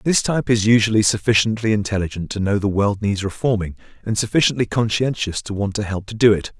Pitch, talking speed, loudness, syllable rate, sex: 105 Hz, 200 wpm, -19 LUFS, 6.2 syllables/s, male